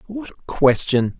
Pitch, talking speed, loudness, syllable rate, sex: 160 Hz, 150 wpm, -18 LUFS, 4.6 syllables/s, male